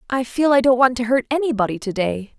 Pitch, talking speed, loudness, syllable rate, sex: 245 Hz, 250 wpm, -19 LUFS, 6.0 syllables/s, female